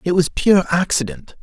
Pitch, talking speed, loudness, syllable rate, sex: 165 Hz, 170 wpm, -17 LUFS, 4.9 syllables/s, male